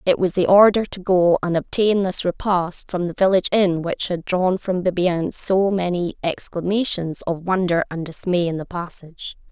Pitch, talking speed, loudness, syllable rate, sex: 180 Hz, 185 wpm, -20 LUFS, 4.9 syllables/s, female